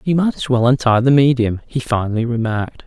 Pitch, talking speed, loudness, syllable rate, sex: 125 Hz, 210 wpm, -16 LUFS, 5.9 syllables/s, male